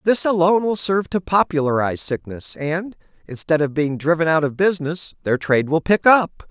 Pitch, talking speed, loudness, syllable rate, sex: 165 Hz, 185 wpm, -19 LUFS, 5.5 syllables/s, male